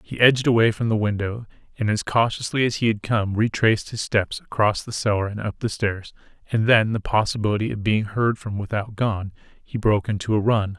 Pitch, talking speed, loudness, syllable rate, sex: 110 Hz, 205 wpm, -22 LUFS, 5.6 syllables/s, male